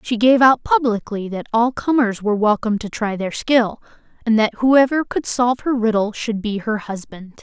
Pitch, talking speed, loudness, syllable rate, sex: 230 Hz, 195 wpm, -18 LUFS, 5.0 syllables/s, female